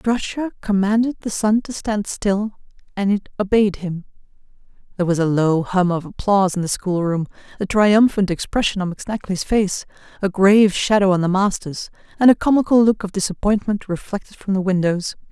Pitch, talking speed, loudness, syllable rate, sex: 200 Hz, 170 wpm, -19 LUFS, 5.4 syllables/s, female